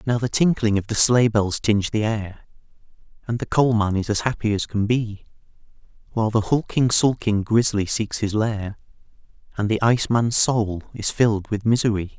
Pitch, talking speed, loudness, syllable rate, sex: 110 Hz, 180 wpm, -21 LUFS, 5.1 syllables/s, male